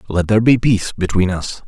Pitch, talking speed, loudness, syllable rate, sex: 100 Hz, 215 wpm, -16 LUFS, 6.1 syllables/s, male